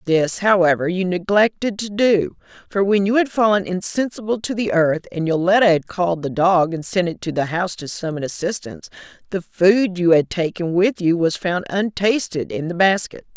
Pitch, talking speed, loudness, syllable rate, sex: 185 Hz, 195 wpm, -19 LUFS, 5.1 syllables/s, female